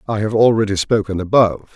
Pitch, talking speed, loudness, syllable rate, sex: 105 Hz, 170 wpm, -16 LUFS, 6.3 syllables/s, male